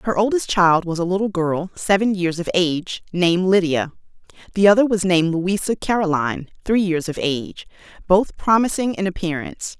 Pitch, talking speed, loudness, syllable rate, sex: 185 Hz, 165 wpm, -19 LUFS, 5.4 syllables/s, female